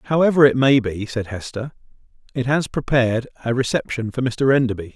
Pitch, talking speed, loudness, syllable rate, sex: 125 Hz, 170 wpm, -19 LUFS, 5.6 syllables/s, male